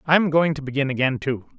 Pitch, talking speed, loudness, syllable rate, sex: 145 Hz, 225 wpm, -21 LUFS, 5.8 syllables/s, male